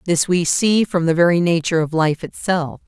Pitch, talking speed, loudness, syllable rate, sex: 170 Hz, 210 wpm, -17 LUFS, 5.2 syllables/s, female